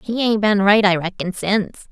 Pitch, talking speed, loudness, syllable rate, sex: 205 Hz, 220 wpm, -17 LUFS, 5.1 syllables/s, female